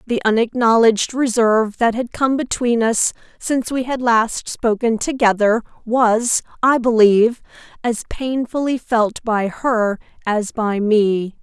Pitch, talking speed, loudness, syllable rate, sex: 230 Hz, 130 wpm, -17 LUFS, 4.1 syllables/s, female